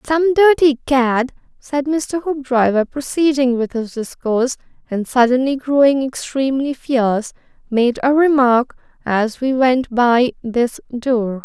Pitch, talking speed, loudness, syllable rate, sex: 260 Hz, 125 wpm, -17 LUFS, 4.0 syllables/s, female